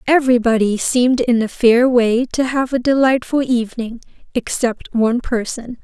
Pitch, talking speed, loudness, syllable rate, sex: 245 Hz, 145 wpm, -16 LUFS, 5.0 syllables/s, female